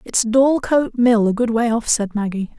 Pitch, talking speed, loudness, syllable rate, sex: 230 Hz, 210 wpm, -17 LUFS, 4.8 syllables/s, female